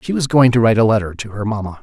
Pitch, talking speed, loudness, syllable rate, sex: 115 Hz, 330 wpm, -15 LUFS, 7.5 syllables/s, male